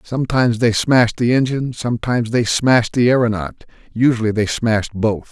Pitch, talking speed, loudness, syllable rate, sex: 115 Hz, 160 wpm, -17 LUFS, 5.9 syllables/s, male